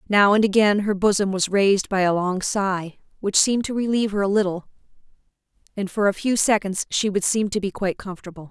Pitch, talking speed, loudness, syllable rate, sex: 200 Hz, 210 wpm, -21 LUFS, 6.0 syllables/s, female